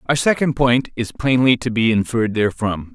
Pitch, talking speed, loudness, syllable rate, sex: 120 Hz, 185 wpm, -18 LUFS, 5.3 syllables/s, male